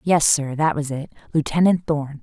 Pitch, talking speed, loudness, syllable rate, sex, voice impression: 150 Hz, 160 wpm, -20 LUFS, 4.7 syllables/s, female, very feminine, very adult-like, slightly thin, slightly tensed, powerful, bright, soft, clear, slightly fluent, raspy, slightly cute, cool, intellectual, refreshing, sincere, slightly calm, friendly, reassuring, slightly unique, slightly elegant, slightly wild, sweet, lively, kind, slightly modest, light